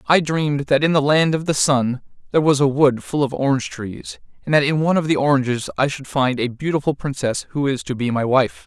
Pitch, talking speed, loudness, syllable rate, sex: 140 Hz, 250 wpm, -19 LUFS, 5.8 syllables/s, male